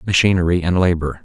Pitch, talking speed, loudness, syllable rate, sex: 90 Hz, 145 wpm, -16 LUFS, 6.4 syllables/s, male